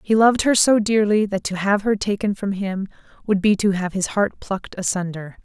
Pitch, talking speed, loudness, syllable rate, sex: 200 Hz, 220 wpm, -20 LUFS, 5.3 syllables/s, female